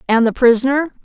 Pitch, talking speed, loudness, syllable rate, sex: 250 Hz, 175 wpm, -14 LUFS, 6.3 syllables/s, female